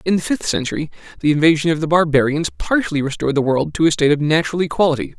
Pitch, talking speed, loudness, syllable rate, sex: 160 Hz, 220 wpm, -17 LUFS, 7.3 syllables/s, male